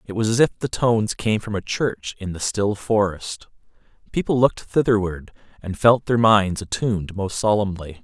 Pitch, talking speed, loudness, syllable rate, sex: 105 Hz, 180 wpm, -21 LUFS, 4.9 syllables/s, male